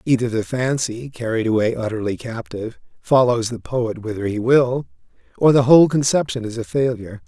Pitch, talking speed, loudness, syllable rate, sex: 120 Hz, 165 wpm, -19 LUFS, 5.4 syllables/s, male